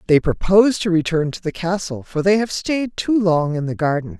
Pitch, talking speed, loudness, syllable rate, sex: 180 Hz, 230 wpm, -19 LUFS, 5.2 syllables/s, female